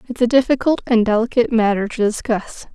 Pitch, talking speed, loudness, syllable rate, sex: 230 Hz, 175 wpm, -17 LUFS, 6.1 syllables/s, female